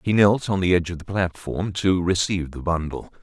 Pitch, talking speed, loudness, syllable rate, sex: 90 Hz, 225 wpm, -22 LUFS, 5.6 syllables/s, male